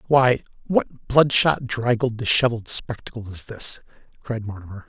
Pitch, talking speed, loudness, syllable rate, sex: 115 Hz, 125 wpm, -22 LUFS, 4.7 syllables/s, male